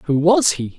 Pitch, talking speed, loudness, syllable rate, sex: 170 Hz, 230 wpm, -16 LUFS, 4.0 syllables/s, male